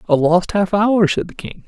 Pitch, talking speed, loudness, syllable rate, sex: 190 Hz, 250 wpm, -16 LUFS, 4.6 syllables/s, male